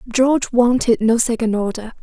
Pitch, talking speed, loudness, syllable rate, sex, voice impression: 235 Hz, 150 wpm, -17 LUFS, 5.4 syllables/s, female, feminine, slightly adult-like, slightly muffled, slightly raspy, slightly refreshing, friendly, slightly kind